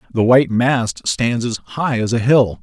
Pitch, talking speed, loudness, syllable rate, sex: 120 Hz, 205 wpm, -17 LUFS, 4.4 syllables/s, male